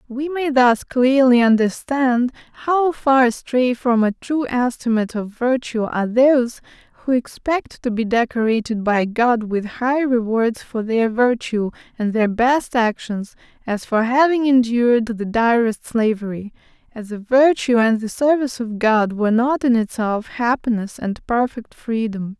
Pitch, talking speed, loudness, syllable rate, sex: 240 Hz, 150 wpm, -18 LUFS, 4.3 syllables/s, female